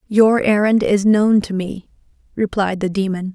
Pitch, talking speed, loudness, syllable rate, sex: 200 Hz, 160 wpm, -17 LUFS, 4.4 syllables/s, female